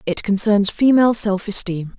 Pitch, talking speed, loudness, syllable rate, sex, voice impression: 205 Hz, 150 wpm, -17 LUFS, 4.9 syllables/s, female, feminine, adult-like, tensed, powerful, slightly soft, slightly raspy, intellectual, calm, reassuring, elegant, lively, slightly sharp